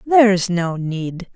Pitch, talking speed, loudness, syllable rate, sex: 190 Hz, 135 wpm, -18 LUFS, 3.3 syllables/s, female